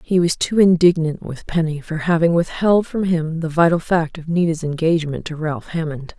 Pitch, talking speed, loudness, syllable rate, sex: 165 Hz, 195 wpm, -18 LUFS, 5.1 syllables/s, female